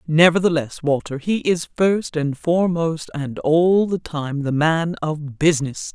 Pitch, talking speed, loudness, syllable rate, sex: 155 Hz, 150 wpm, -20 LUFS, 4.1 syllables/s, female